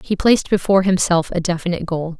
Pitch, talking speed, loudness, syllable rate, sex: 180 Hz, 190 wpm, -17 LUFS, 6.8 syllables/s, female